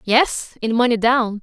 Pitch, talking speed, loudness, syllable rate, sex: 235 Hz, 125 wpm, -18 LUFS, 4.0 syllables/s, female